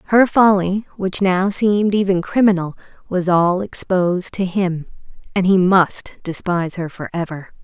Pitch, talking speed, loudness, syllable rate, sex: 185 Hz, 140 wpm, -18 LUFS, 4.6 syllables/s, female